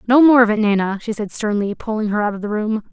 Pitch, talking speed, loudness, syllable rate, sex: 215 Hz, 290 wpm, -17 LUFS, 6.4 syllables/s, female